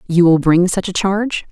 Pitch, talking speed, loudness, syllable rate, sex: 185 Hz, 235 wpm, -15 LUFS, 5.2 syllables/s, female